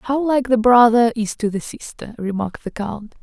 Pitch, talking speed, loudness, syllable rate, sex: 230 Hz, 205 wpm, -18 LUFS, 4.9 syllables/s, female